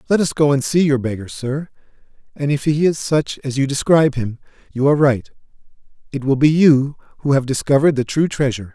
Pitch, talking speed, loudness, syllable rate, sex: 140 Hz, 200 wpm, -17 LUFS, 6.0 syllables/s, male